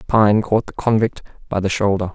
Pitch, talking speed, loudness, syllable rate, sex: 105 Hz, 195 wpm, -18 LUFS, 5.2 syllables/s, male